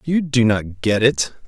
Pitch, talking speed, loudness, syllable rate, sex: 120 Hz, 205 wpm, -18 LUFS, 4.0 syllables/s, male